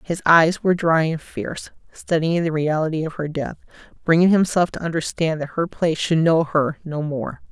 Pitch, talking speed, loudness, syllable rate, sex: 160 Hz, 190 wpm, -20 LUFS, 5.2 syllables/s, female